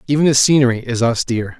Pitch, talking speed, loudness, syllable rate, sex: 125 Hz, 190 wpm, -15 LUFS, 7.0 syllables/s, male